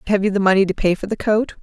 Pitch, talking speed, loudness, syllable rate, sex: 200 Hz, 370 wpm, -18 LUFS, 7.4 syllables/s, female